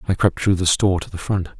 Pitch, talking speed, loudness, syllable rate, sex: 90 Hz, 300 wpm, -20 LUFS, 6.6 syllables/s, male